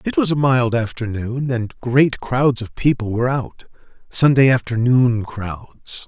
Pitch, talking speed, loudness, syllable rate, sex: 125 Hz, 150 wpm, -18 LUFS, 4.2 syllables/s, male